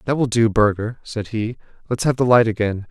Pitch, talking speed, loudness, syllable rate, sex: 115 Hz, 230 wpm, -19 LUFS, 5.5 syllables/s, male